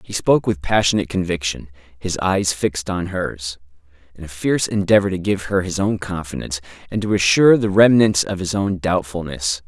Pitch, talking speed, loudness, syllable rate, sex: 90 Hz, 180 wpm, -19 LUFS, 5.6 syllables/s, male